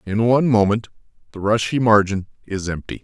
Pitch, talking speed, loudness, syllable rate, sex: 105 Hz, 160 wpm, -19 LUFS, 5.6 syllables/s, male